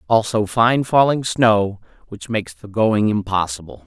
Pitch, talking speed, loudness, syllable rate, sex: 110 Hz, 140 wpm, -18 LUFS, 4.4 syllables/s, male